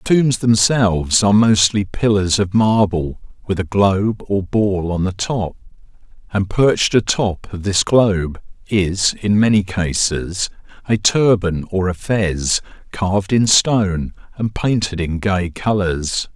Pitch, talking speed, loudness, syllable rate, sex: 100 Hz, 145 wpm, -17 LUFS, 4.0 syllables/s, male